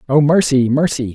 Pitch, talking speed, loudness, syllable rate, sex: 140 Hz, 155 wpm, -14 LUFS, 5.2 syllables/s, male